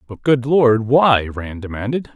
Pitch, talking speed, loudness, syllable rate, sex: 120 Hz, 165 wpm, -16 LUFS, 4.0 syllables/s, male